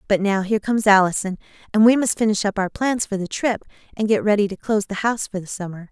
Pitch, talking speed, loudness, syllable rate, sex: 205 Hz, 255 wpm, -20 LUFS, 6.7 syllables/s, female